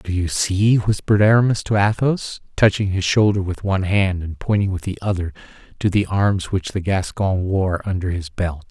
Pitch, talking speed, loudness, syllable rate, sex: 95 Hz, 195 wpm, -19 LUFS, 5.0 syllables/s, male